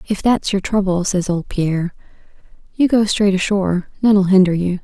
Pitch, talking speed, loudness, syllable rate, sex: 190 Hz, 175 wpm, -17 LUFS, 5.3 syllables/s, female